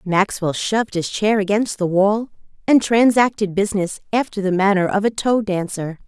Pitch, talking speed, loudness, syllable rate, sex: 200 Hz, 170 wpm, -18 LUFS, 5.0 syllables/s, female